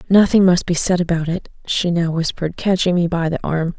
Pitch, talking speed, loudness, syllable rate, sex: 175 Hz, 220 wpm, -18 LUFS, 5.5 syllables/s, female